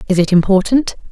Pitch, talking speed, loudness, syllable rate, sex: 200 Hz, 160 wpm, -13 LUFS, 6.1 syllables/s, female